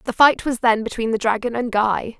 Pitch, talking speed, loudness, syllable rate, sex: 230 Hz, 245 wpm, -19 LUFS, 5.4 syllables/s, female